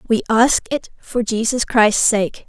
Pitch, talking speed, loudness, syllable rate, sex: 225 Hz, 170 wpm, -17 LUFS, 3.8 syllables/s, female